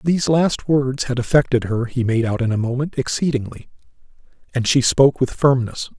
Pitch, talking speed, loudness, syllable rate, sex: 130 Hz, 180 wpm, -19 LUFS, 5.4 syllables/s, male